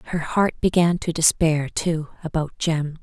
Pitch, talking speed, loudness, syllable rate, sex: 160 Hz, 160 wpm, -21 LUFS, 4.3 syllables/s, female